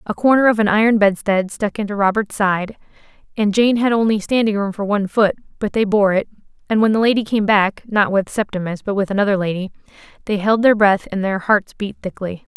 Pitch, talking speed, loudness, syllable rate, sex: 205 Hz, 205 wpm, -17 LUFS, 5.7 syllables/s, female